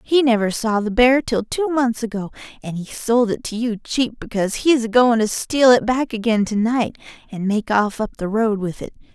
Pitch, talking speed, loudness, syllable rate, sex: 230 Hz, 230 wpm, -19 LUFS, 4.9 syllables/s, female